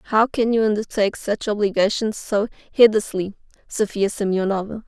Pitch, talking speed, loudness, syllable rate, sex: 210 Hz, 125 wpm, -21 LUFS, 5.4 syllables/s, female